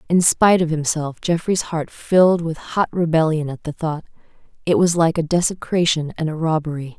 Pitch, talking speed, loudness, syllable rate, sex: 160 Hz, 180 wpm, -19 LUFS, 5.2 syllables/s, female